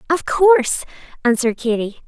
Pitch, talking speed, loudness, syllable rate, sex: 270 Hz, 115 wpm, -17 LUFS, 5.5 syllables/s, female